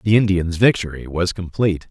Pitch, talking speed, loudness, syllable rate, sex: 95 Hz, 155 wpm, -19 LUFS, 5.4 syllables/s, male